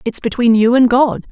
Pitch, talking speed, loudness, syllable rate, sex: 240 Hz, 230 wpm, -13 LUFS, 5.1 syllables/s, female